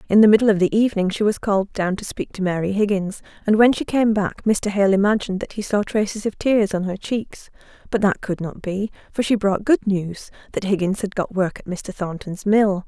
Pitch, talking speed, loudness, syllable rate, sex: 200 Hz, 235 wpm, -20 LUFS, 5.4 syllables/s, female